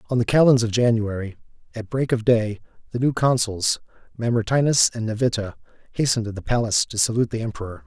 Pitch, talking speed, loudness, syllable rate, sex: 115 Hz, 175 wpm, -21 LUFS, 6.3 syllables/s, male